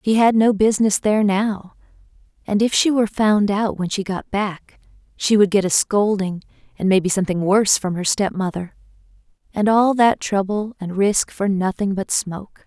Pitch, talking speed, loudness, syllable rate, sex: 200 Hz, 180 wpm, -19 LUFS, 5.0 syllables/s, female